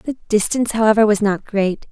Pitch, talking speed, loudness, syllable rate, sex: 215 Hz, 190 wpm, -17 LUFS, 5.4 syllables/s, female